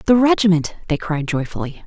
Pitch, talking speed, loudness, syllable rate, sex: 175 Hz, 160 wpm, -19 LUFS, 5.7 syllables/s, female